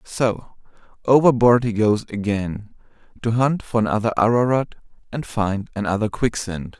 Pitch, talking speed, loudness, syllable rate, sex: 110 Hz, 125 wpm, -20 LUFS, 4.6 syllables/s, male